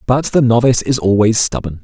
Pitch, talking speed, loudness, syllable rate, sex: 120 Hz, 195 wpm, -13 LUFS, 5.9 syllables/s, male